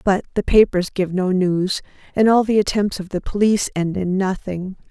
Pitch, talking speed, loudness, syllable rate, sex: 190 Hz, 195 wpm, -19 LUFS, 5.1 syllables/s, female